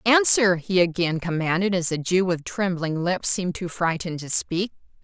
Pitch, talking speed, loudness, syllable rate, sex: 180 Hz, 180 wpm, -23 LUFS, 5.0 syllables/s, female